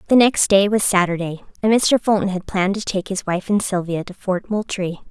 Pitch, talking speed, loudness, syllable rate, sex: 195 Hz, 225 wpm, -19 LUFS, 5.4 syllables/s, female